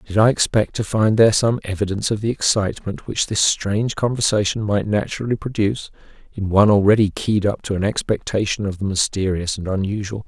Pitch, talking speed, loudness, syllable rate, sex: 105 Hz, 180 wpm, -19 LUFS, 6.0 syllables/s, male